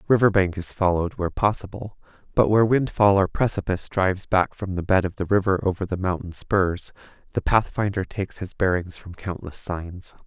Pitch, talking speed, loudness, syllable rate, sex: 95 Hz, 180 wpm, -23 LUFS, 5.5 syllables/s, male